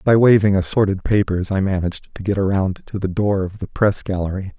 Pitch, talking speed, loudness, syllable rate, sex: 95 Hz, 210 wpm, -19 LUFS, 5.7 syllables/s, male